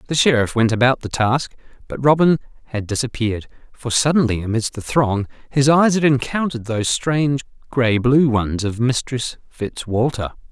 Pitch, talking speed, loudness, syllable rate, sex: 125 Hz, 155 wpm, -19 LUFS, 5.1 syllables/s, male